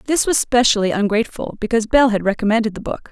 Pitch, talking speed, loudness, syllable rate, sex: 225 Hz, 190 wpm, -17 LUFS, 6.9 syllables/s, female